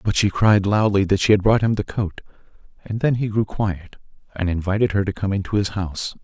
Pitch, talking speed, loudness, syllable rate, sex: 100 Hz, 230 wpm, -20 LUFS, 5.7 syllables/s, male